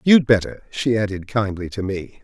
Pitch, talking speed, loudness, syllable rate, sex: 110 Hz, 190 wpm, -21 LUFS, 4.9 syllables/s, male